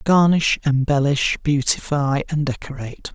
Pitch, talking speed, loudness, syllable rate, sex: 145 Hz, 95 wpm, -19 LUFS, 4.4 syllables/s, male